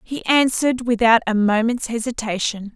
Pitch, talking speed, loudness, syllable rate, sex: 230 Hz, 130 wpm, -19 LUFS, 5.0 syllables/s, female